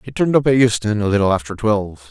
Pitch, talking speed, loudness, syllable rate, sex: 110 Hz, 255 wpm, -17 LUFS, 7.0 syllables/s, male